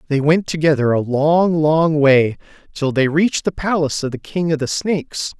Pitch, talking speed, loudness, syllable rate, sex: 150 Hz, 200 wpm, -17 LUFS, 5.0 syllables/s, male